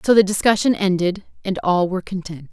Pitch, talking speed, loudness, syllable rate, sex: 185 Hz, 190 wpm, -19 LUFS, 5.9 syllables/s, female